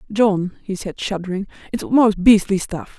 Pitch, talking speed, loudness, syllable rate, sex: 200 Hz, 160 wpm, -19 LUFS, 4.5 syllables/s, female